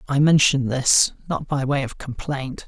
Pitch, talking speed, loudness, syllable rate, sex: 135 Hz, 180 wpm, -20 LUFS, 4.2 syllables/s, male